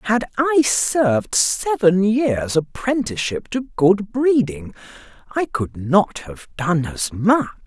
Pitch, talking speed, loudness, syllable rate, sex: 200 Hz, 125 wpm, -19 LUFS, 3.5 syllables/s, male